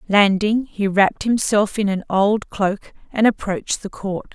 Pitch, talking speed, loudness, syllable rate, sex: 200 Hz, 165 wpm, -19 LUFS, 4.4 syllables/s, female